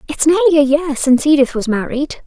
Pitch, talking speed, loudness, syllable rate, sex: 275 Hz, 210 wpm, -14 LUFS, 6.0 syllables/s, female